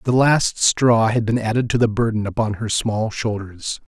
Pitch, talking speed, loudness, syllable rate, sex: 110 Hz, 200 wpm, -19 LUFS, 4.6 syllables/s, male